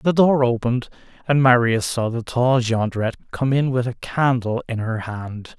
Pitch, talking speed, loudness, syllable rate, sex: 120 Hz, 185 wpm, -20 LUFS, 4.7 syllables/s, male